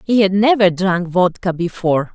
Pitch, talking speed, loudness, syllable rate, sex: 185 Hz, 170 wpm, -16 LUFS, 4.9 syllables/s, female